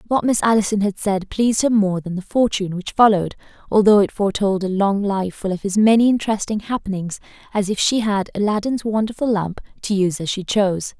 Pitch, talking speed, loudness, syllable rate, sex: 205 Hz, 200 wpm, -19 LUFS, 6.0 syllables/s, female